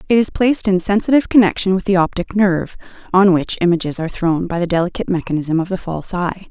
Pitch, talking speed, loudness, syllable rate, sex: 185 Hz, 210 wpm, -17 LUFS, 6.8 syllables/s, female